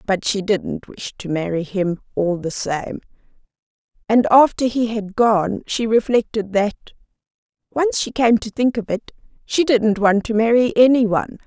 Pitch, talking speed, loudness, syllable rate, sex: 220 Hz, 165 wpm, -18 LUFS, 4.5 syllables/s, female